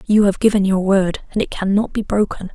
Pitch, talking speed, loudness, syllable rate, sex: 200 Hz, 235 wpm, -17 LUFS, 5.6 syllables/s, female